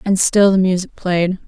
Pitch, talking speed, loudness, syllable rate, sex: 185 Hz, 205 wpm, -15 LUFS, 4.6 syllables/s, female